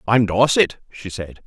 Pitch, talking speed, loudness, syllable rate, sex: 105 Hz, 205 wpm, -18 LUFS, 5.1 syllables/s, male